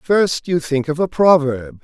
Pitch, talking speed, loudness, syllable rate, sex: 155 Hz, 195 wpm, -17 LUFS, 3.9 syllables/s, male